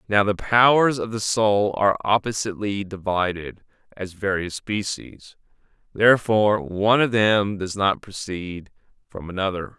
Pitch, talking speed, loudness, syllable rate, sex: 100 Hz, 130 wpm, -21 LUFS, 4.5 syllables/s, male